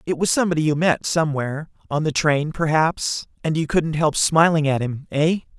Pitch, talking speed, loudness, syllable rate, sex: 155 Hz, 185 wpm, -20 LUFS, 5.3 syllables/s, male